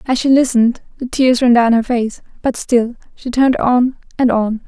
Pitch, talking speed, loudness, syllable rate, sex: 245 Hz, 205 wpm, -15 LUFS, 5.1 syllables/s, female